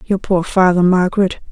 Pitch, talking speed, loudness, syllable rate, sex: 185 Hz, 160 wpm, -14 LUFS, 5.2 syllables/s, female